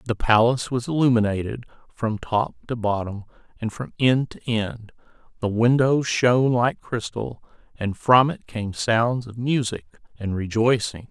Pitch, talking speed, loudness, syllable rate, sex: 115 Hz, 145 wpm, -22 LUFS, 4.4 syllables/s, male